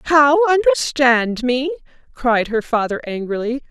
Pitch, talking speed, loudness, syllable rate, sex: 270 Hz, 115 wpm, -17 LUFS, 4.0 syllables/s, female